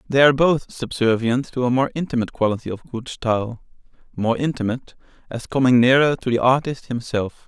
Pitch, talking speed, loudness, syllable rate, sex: 125 Hz, 170 wpm, -20 LUFS, 5.7 syllables/s, male